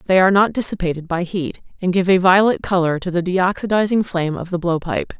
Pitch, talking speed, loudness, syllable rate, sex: 185 Hz, 210 wpm, -18 LUFS, 6.2 syllables/s, female